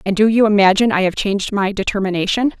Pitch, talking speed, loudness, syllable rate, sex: 205 Hz, 210 wpm, -16 LUFS, 6.9 syllables/s, female